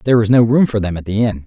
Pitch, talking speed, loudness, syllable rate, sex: 110 Hz, 370 wpm, -15 LUFS, 7.4 syllables/s, male